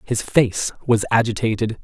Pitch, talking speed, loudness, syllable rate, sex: 115 Hz, 130 wpm, -19 LUFS, 4.4 syllables/s, male